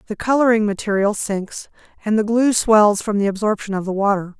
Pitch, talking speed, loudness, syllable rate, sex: 210 Hz, 190 wpm, -18 LUFS, 5.4 syllables/s, female